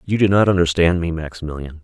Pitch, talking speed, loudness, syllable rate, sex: 85 Hz, 195 wpm, -18 LUFS, 6.4 syllables/s, male